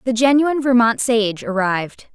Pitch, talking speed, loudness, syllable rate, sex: 230 Hz, 140 wpm, -17 LUFS, 5.0 syllables/s, female